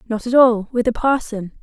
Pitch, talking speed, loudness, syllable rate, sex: 230 Hz, 220 wpm, -17 LUFS, 5.0 syllables/s, female